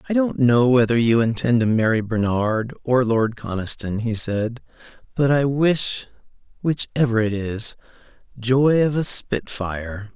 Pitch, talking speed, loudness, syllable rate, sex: 120 Hz, 150 wpm, -20 LUFS, 4.2 syllables/s, male